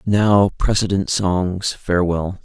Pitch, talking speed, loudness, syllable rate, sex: 95 Hz, 100 wpm, -18 LUFS, 3.6 syllables/s, male